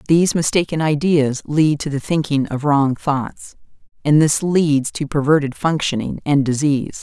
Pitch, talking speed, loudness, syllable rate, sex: 150 Hz, 155 wpm, -18 LUFS, 4.6 syllables/s, female